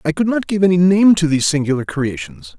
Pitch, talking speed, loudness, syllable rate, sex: 175 Hz, 230 wpm, -15 LUFS, 6.0 syllables/s, male